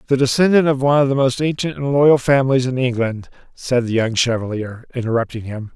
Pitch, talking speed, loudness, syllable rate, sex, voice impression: 130 Hz, 200 wpm, -17 LUFS, 6.0 syllables/s, male, very masculine, slightly old, very thick, slightly tensed, weak, dark, soft, slightly muffled, fluent, slightly raspy, cool, slightly intellectual, slightly refreshing, sincere, very calm, very mature, slightly friendly, slightly reassuring, unique, slightly elegant, wild, slightly sweet, slightly lively, kind, modest